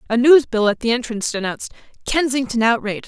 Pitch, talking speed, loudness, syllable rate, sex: 240 Hz, 175 wpm, -18 LUFS, 6.7 syllables/s, female